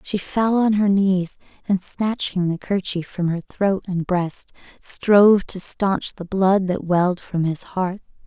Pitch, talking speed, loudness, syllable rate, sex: 190 Hz, 175 wpm, -20 LUFS, 3.8 syllables/s, female